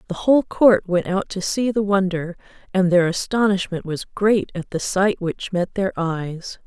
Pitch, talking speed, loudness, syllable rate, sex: 190 Hz, 190 wpm, -20 LUFS, 4.4 syllables/s, female